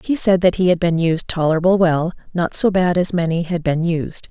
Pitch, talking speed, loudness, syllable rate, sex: 175 Hz, 235 wpm, -17 LUFS, 5.3 syllables/s, female